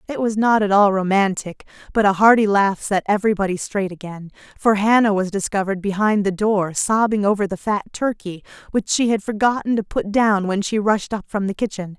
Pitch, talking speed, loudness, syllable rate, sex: 205 Hz, 200 wpm, -19 LUFS, 5.4 syllables/s, female